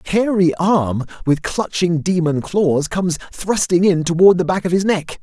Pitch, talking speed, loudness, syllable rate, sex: 175 Hz, 185 wpm, -17 LUFS, 4.7 syllables/s, male